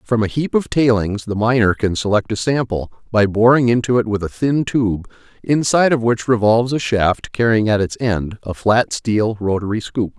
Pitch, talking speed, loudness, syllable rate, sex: 110 Hz, 200 wpm, -17 LUFS, 5.0 syllables/s, male